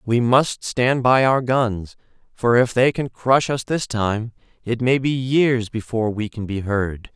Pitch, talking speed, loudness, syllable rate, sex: 120 Hz, 195 wpm, -20 LUFS, 3.9 syllables/s, male